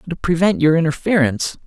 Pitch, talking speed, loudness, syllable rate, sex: 165 Hz, 145 wpm, -17 LUFS, 6.3 syllables/s, male